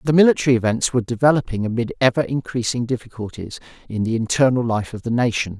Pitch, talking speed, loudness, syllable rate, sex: 120 Hz, 170 wpm, -20 LUFS, 6.7 syllables/s, male